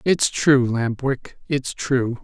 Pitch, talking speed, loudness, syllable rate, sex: 130 Hz, 160 wpm, -21 LUFS, 2.9 syllables/s, male